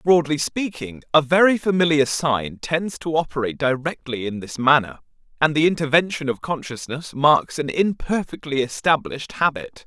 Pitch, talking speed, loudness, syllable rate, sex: 150 Hz, 140 wpm, -21 LUFS, 5.0 syllables/s, male